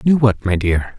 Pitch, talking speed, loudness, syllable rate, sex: 110 Hz, 245 wpm, -17 LUFS, 4.5 syllables/s, male